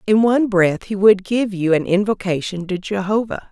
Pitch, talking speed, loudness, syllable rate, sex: 200 Hz, 190 wpm, -18 LUFS, 5.2 syllables/s, female